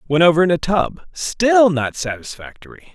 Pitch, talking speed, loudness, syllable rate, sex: 155 Hz, 145 wpm, -17 LUFS, 4.8 syllables/s, male